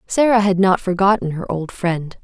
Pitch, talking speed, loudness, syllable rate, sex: 190 Hz, 190 wpm, -17 LUFS, 4.8 syllables/s, female